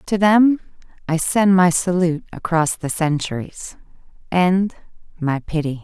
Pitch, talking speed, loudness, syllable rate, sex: 175 Hz, 125 wpm, -18 LUFS, 4.3 syllables/s, female